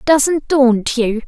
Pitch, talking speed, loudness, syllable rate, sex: 260 Hz, 140 wpm, -14 LUFS, 2.7 syllables/s, female